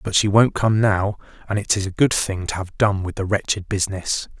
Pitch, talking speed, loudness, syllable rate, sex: 100 Hz, 245 wpm, -20 LUFS, 5.4 syllables/s, male